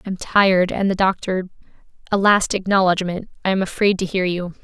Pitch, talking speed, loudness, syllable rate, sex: 190 Hz, 170 wpm, -19 LUFS, 5.5 syllables/s, female